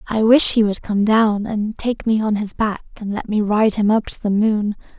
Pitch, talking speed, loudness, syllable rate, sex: 215 Hz, 255 wpm, -18 LUFS, 4.7 syllables/s, female